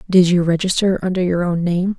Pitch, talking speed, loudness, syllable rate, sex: 180 Hz, 210 wpm, -17 LUFS, 5.6 syllables/s, female